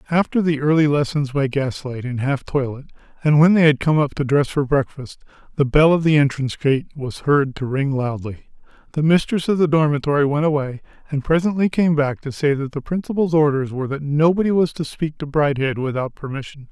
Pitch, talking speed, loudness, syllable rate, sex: 145 Hz, 210 wpm, -19 LUFS, 5.7 syllables/s, male